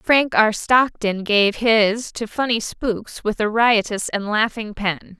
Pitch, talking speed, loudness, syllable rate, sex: 220 Hz, 160 wpm, -19 LUFS, 3.5 syllables/s, female